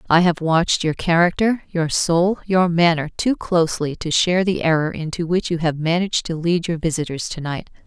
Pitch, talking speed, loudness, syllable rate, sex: 170 Hz, 200 wpm, -19 LUFS, 5.3 syllables/s, female